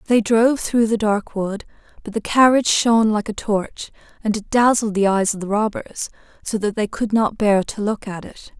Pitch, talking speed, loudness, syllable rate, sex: 215 Hz, 215 wpm, -19 LUFS, 5.0 syllables/s, female